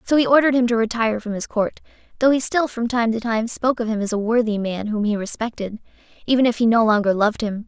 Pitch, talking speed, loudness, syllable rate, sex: 225 Hz, 260 wpm, -20 LUFS, 6.5 syllables/s, female